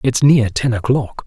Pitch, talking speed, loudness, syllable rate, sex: 125 Hz, 190 wpm, -15 LUFS, 4.4 syllables/s, male